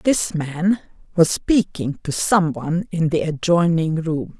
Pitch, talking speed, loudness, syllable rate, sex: 165 Hz, 135 wpm, -20 LUFS, 3.8 syllables/s, female